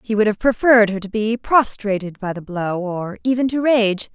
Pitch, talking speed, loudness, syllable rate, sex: 215 Hz, 215 wpm, -18 LUFS, 5.0 syllables/s, female